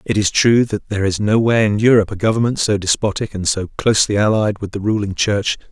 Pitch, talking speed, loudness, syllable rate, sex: 105 Hz, 220 wpm, -16 LUFS, 6.2 syllables/s, male